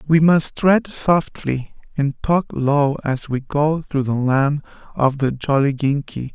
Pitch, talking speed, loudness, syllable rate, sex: 145 Hz, 150 wpm, -19 LUFS, 3.5 syllables/s, male